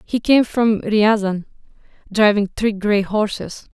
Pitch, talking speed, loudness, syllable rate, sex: 210 Hz, 130 wpm, -18 LUFS, 3.9 syllables/s, female